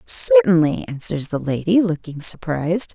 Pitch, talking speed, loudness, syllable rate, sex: 170 Hz, 120 wpm, -18 LUFS, 4.6 syllables/s, female